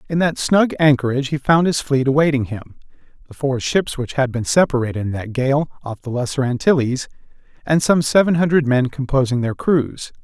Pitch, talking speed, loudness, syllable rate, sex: 135 Hz, 180 wpm, -18 LUFS, 5.3 syllables/s, male